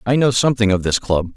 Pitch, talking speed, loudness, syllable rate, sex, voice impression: 110 Hz, 265 wpm, -17 LUFS, 6.5 syllables/s, male, masculine, adult-like, tensed, slightly clear, cool, intellectual, slightly refreshing, sincere, calm, friendly